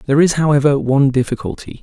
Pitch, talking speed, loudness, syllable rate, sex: 135 Hz, 165 wpm, -15 LUFS, 7.2 syllables/s, male